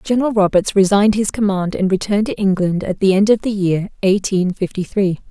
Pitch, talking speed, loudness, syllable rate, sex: 195 Hz, 205 wpm, -16 LUFS, 5.8 syllables/s, female